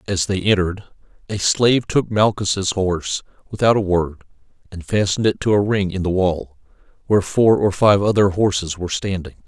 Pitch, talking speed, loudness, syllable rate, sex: 95 Hz, 175 wpm, -18 LUFS, 5.4 syllables/s, male